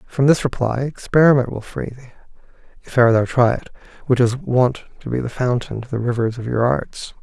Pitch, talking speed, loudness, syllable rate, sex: 125 Hz, 210 wpm, -19 LUFS, 5.6 syllables/s, male